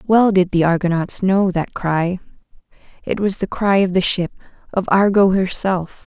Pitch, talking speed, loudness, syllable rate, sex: 185 Hz, 155 wpm, -17 LUFS, 4.5 syllables/s, female